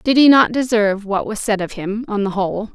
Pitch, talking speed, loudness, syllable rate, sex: 215 Hz, 265 wpm, -17 LUFS, 5.8 syllables/s, female